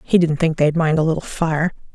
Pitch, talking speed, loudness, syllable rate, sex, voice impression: 160 Hz, 245 wpm, -19 LUFS, 5.4 syllables/s, female, very feminine, slightly old, very thin, tensed, weak, bright, very hard, very clear, fluent, slightly raspy, very cute, very intellectual, very refreshing, sincere, very calm, very friendly, very reassuring, very unique, very elegant, slightly wild, slightly sweet, lively, kind, slightly modest